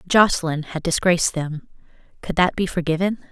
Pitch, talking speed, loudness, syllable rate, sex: 170 Hz, 145 wpm, -21 LUFS, 5.6 syllables/s, female